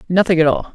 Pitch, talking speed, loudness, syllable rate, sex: 170 Hz, 240 wpm, -15 LUFS, 7.1 syllables/s, male